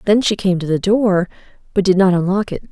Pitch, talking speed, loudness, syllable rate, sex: 190 Hz, 245 wpm, -16 LUFS, 5.8 syllables/s, female